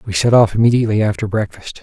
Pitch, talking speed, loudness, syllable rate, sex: 110 Hz, 195 wpm, -15 LUFS, 7.1 syllables/s, male